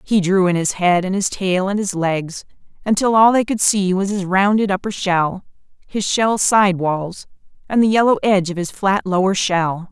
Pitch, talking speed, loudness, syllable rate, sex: 190 Hz, 205 wpm, -17 LUFS, 4.7 syllables/s, female